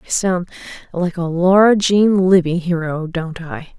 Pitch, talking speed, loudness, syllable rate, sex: 175 Hz, 160 wpm, -16 LUFS, 4.1 syllables/s, female